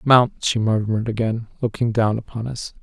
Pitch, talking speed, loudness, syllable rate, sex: 115 Hz, 170 wpm, -21 LUFS, 5.1 syllables/s, male